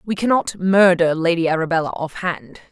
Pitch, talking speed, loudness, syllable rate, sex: 175 Hz, 155 wpm, -18 LUFS, 5.2 syllables/s, female